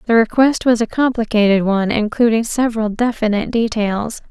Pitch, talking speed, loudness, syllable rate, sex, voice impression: 225 Hz, 140 wpm, -16 LUFS, 5.6 syllables/s, female, feminine, slightly adult-like, slightly soft, slightly cute, calm, friendly, slightly sweet